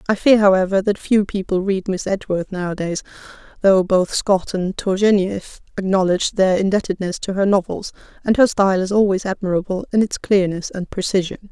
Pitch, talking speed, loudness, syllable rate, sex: 190 Hz, 165 wpm, -18 LUFS, 5.5 syllables/s, female